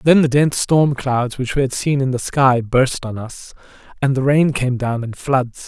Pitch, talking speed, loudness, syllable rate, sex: 130 Hz, 235 wpm, -17 LUFS, 4.5 syllables/s, male